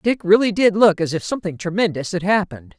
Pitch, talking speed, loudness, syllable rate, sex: 190 Hz, 215 wpm, -18 LUFS, 6.2 syllables/s, female